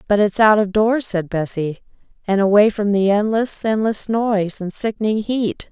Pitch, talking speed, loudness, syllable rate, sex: 210 Hz, 180 wpm, -18 LUFS, 4.7 syllables/s, female